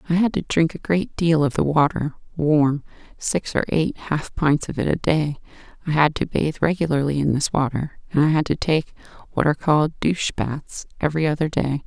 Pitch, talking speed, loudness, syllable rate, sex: 155 Hz, 200 wpm, -21 LUFS, 5.3 syllables/s, female